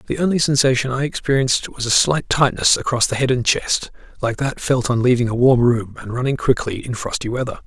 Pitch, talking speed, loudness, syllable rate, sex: 125 Hz, 220 wpm, -18 LUFS, 5.8 syllables/s, male